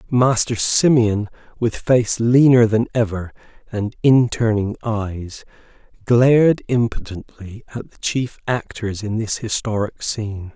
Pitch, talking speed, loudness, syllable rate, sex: 115 Hz, 115 wpm, -18 LUFS, 3.9 syllables/s, male